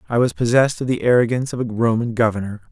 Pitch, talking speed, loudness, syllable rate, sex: 120 Hz, 220 wpm, -19 LUFS, 7.4 syllables/s, male